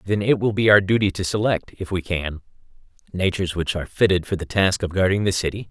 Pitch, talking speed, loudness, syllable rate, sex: 95 Hz, 230 wpm, -21 LUFS, 6.3 syllables/s, male